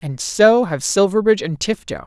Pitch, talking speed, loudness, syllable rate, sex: 185 Hz, 175 wpm, -17 LUFS, 5.1 syllables/s, female